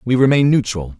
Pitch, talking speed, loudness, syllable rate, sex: 120 Hz, 180 wpm, -15 LUFS, 5.7 syllables/s, male